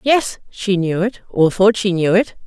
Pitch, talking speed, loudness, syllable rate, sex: 200 Hz, 220 wpm, -17 LUFS, 4.2 syllables/s, female